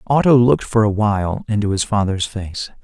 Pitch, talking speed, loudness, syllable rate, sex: 105 Hz, 190 wpm, -17 LUFS, 5.5 syllables/s, male